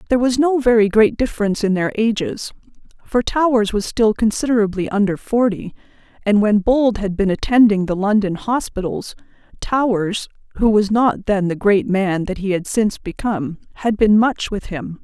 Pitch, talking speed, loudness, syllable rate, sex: 210 Hz, 170 wpm, -18 LUFS, 5.1 syllables/s, female